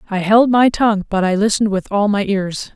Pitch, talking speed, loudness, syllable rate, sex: 205 Hz, 240 wpm, -15 LUFS, 5.7 syllables/s, female